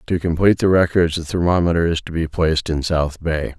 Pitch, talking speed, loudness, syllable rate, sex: 85 Hz, 220 wpm, -18 LUFS, 5.8 syllables/s, male